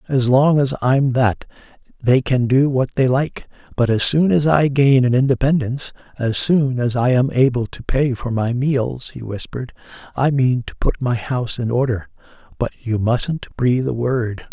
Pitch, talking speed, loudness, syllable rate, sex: 130 Hz, 190 wpm, -18 LUFS, 4.7 syllables/s, male